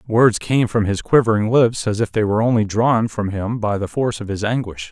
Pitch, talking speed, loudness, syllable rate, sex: 110 Hz, 245 wpm, -18 LUFS, 5.5 syllables/s, male